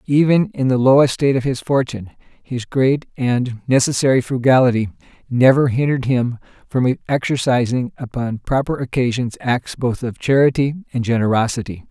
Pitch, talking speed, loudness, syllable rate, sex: 125 Hz, 135 wpm, -18 LUFS, 5.2 syllables/s, male